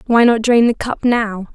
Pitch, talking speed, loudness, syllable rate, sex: 230 Hz, 235 wpm, -15 LUFS, 4.5 syllables/s, female